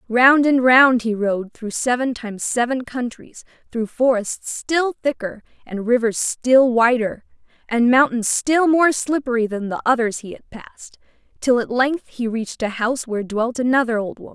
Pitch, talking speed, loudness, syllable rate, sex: 240 Hz, 170 wpm, -19 LUFS, 4.7 syllables/s, female